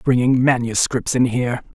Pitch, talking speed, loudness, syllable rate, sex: 125 Hz, 135 wpm, -18 LUFS, 5.1 syllables/s, male